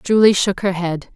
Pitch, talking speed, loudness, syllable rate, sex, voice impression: 190 Hz, 205 wpm, -17 LUFS, 4.5 syllables/s, female, feminine, adult-like, powerful, intellectual, sharp